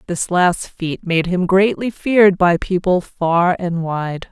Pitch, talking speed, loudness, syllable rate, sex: 180 Hz, 165 wpm, -17 LUFS, 3.6 syllables/s, female